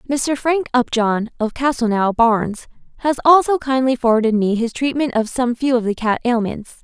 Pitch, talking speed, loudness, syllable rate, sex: 245 Hz, 175 wpm, -18 LUFS, 5.0 syllables/s, female